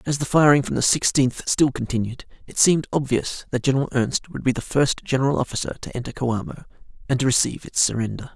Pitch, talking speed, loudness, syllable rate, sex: 130 Hz, 200 wpm, -21 LUFS, 6.2 syllables/s, male